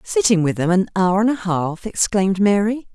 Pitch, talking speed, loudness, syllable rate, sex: 195 Hz, 205 wpm, -18 LUFS, 5.1 syllables/s, female